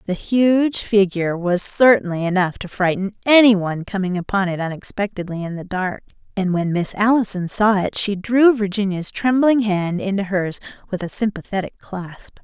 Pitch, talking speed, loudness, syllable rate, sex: 195 Hz, 165 wpm, -19 LUFS, 4.9 syllables/s, female